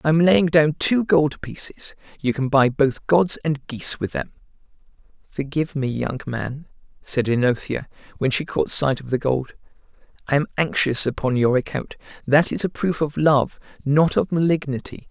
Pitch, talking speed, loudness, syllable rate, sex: 145 Hz, 170 wpm, -21 LUFS, 4.7 syllables/s, male